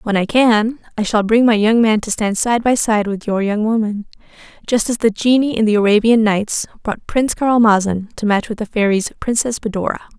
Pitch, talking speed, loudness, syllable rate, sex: 220 Hz, 210 wpm, -16 LUFS, 5.4 syllables/s, female